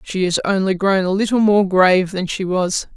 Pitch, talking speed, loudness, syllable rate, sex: 190 Hz, 225 wpm, -17 LUFS, 5.1 syllables/s, female